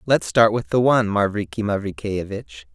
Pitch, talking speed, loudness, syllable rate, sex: 105 Hz, 155 wpm, -20 LUFS, 5.1 syllables/s, male